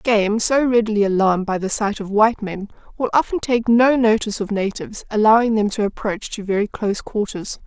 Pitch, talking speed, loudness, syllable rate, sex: 215 Hz, 195 wpm, -19 LUFS, 5.7 syllables/s, female